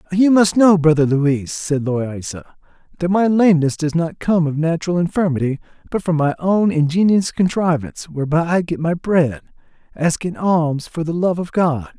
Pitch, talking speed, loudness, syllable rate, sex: 165 Hz, 170 wpm, -17 LUFS, 5.0 syllables/s, male